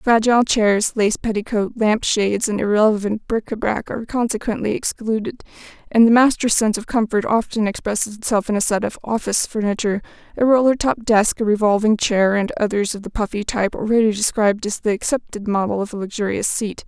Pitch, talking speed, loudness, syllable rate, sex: 215 Hz, 180 wpm, -19 LUFS, 5.9 syllables/s, female